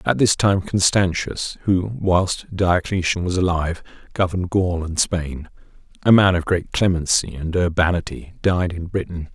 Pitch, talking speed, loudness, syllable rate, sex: 90 Hz, 150 wpm, -20 LUFS, 4.5 syllables/s, male